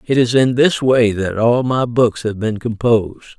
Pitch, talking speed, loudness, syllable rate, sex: 115 Hz, 215 wpm, -15 LUFS, 4.4 syllables/s, male